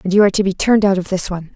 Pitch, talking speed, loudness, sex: 195 Hz, 385 wpm, -16 LUFS, female